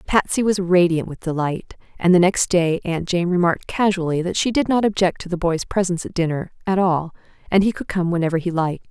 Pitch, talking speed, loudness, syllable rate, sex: 175 Hz, 220 wpm, -20 LUFS, 5.9 syllables/s, female